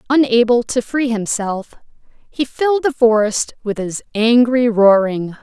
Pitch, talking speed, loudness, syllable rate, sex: 235 Hz, 135 wpm, -16 LUFS, 4.1 syllables/s, female